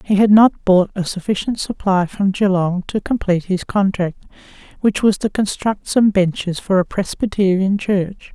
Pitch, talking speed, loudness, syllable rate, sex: 195 Hz, 165 wpm, -17 LUFS, 4.7 syllables/s, female